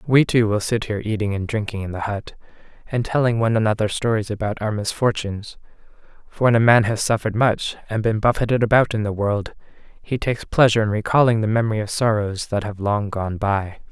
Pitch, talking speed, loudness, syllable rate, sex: 110 Hz, 205 wpm, -20 LUFS, 6.1 syllables/s, male